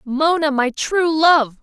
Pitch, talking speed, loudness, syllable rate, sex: 295 Hz, 145 wpm, -16 LUFS, 3.3 syllables/s, female